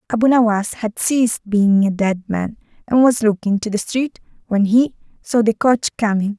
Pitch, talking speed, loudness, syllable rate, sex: 220 Hz, 190 wpm, -17 LUFS, 5.0 syllables/s, female